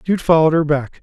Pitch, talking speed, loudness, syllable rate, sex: 155 Hz, 235 wpm, -15 LUFS, 6.5 syllables/s, male